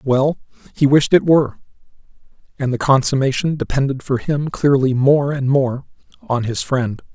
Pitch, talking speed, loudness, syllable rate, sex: 135 Hz, 150 wpm, -17 LUFS, 4.7 syllables/s, male